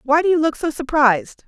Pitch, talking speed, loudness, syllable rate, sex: 295 Hz, 245 wpm, -18 LUFS, 5.8 syllables/s, female